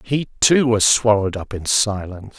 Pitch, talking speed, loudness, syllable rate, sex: 110 Hz, 175 wpm, -17 LUFS, 5.1 syllables/s, male